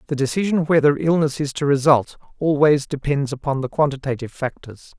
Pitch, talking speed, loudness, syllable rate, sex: 145 Hz, 155 wpm, -20 LUFS, 5.7 syllables/s, male